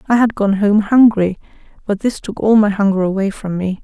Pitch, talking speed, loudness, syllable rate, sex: 205 Hz, 220 wpm, -15 LUFS, 5.4 syllables/s, female